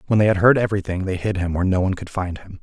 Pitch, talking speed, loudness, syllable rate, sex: 95 Hz, 320 wpm, -20 LUFS, 7.8 syllables/s, male